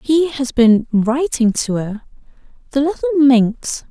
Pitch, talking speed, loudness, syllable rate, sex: 265 Hz, 140 wpm, -16 LUFS, 3.8 syllables/s, female